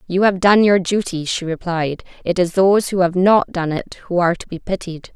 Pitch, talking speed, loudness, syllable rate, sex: 180 Hz, 235 wpm, -17 LUFS, 5.4 syllables/s, female